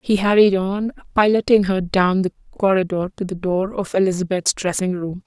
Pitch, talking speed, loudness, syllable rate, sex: 190 Hz, 170 wpm, -19 LUFS, 5.1 syllables/s, female